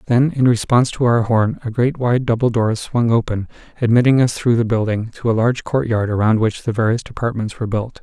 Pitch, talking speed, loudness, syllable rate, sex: 115 Hz, 215 wpm, -17 LUFS, 5.8 syllables/s, male